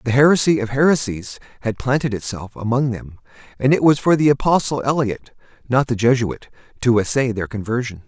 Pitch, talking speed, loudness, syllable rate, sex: 120 Hz, 170 wpm, -19 LUFS, 5.5 syllables/s, male